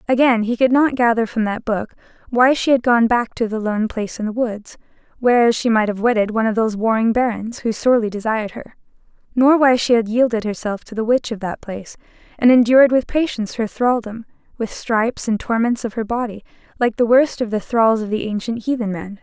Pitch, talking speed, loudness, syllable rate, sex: 230 Hz, 220 wpm, -18 LUFS, 5.8 syllables/s, female